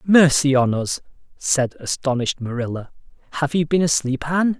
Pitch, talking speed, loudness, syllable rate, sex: 145 Hz, 145 wpm, -20 LUFS, 5.3 syllables/s, male